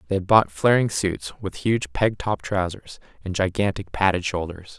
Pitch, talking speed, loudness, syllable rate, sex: 95 Hz, 175 wpm, -23 LUFS, 4.6 syllables/s, male